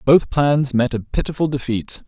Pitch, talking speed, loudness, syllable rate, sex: 135 Hz, 175 wpm, -19 LUFS, 4.7 syllables/s, male